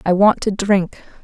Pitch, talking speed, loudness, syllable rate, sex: 195 Hz, 195 wpm, -16 LUFS, 4.1 syllables/s, female